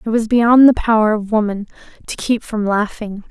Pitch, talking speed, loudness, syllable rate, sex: 220 Hz, 200 wpm, -15 LUFS, 5.0 syllables/s, female